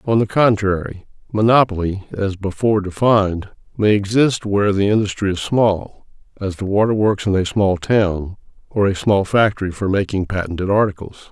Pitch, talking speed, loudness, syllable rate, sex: 100 Hz, 155 wpm, -18 LUFS, 5.2 syllables/s, male